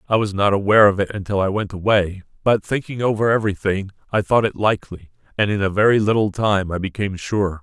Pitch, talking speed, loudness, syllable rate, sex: 100 Hz, 210 wpm, -19 LUFS, 6.2 syllables/s, male